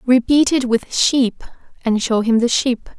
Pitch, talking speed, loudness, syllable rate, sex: 245 Hz, 180 wpm, -17 LUFS, 4.0 syllables/s, female